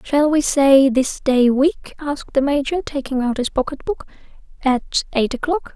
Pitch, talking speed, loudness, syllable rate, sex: 280 Hz, 165 wpm, -18 LUFS, 4.7 syllables/s, female